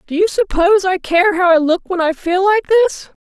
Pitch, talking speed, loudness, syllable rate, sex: 355 Hz, 240 wpm, -14 LUFS, 5.2 syllables/s, female